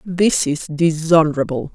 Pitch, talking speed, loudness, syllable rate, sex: 160 Hz, 105 wpm, -17 LUFS, 4.3 syllables/s, female